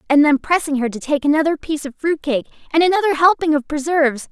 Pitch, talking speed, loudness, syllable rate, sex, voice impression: 300 Hz, 225 wpm, -17 LUFS, 6.5 syllables/s, female, feminine, slightly young, tensed, powerful, bright, clear, fluent, intellectual, friendly, lively, light